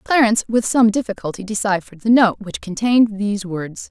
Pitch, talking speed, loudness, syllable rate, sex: 210 Hz, 170 wpm, -18 LUFS, 5.8 syllables/s, female